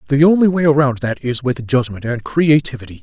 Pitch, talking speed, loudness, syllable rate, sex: 135 Hz, 200 wpm, -16 LUFS, 5.7 syllables/s, male